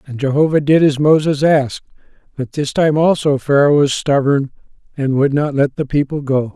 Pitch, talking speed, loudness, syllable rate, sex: 145 Hz, 185 wpm, -15 LUFS, 5.2 syllables/s, male